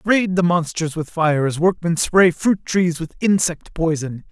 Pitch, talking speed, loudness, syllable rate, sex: 170 Hz, 195 wpm, -19 LUFS, 4.3 syllables/s, male